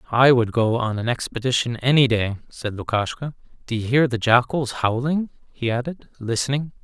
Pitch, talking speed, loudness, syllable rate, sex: 125 Hz, 160 wpm, -21 LUFS, 5.1 syllables/s, male